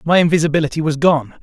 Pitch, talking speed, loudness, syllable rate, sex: 155 Hz, 170 wpm, -15 LUFS, 6.9 syllables/s, male